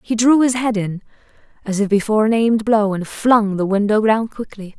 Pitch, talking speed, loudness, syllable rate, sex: 215 Hz, 215 wpm, -17 LUFS, 5.4 syllables/s, female